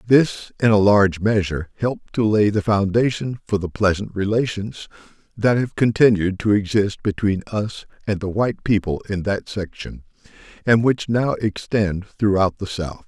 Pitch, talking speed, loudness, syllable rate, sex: 105 Hz, 160 wpm, -20 LUFS, 4.7 syllables/s, male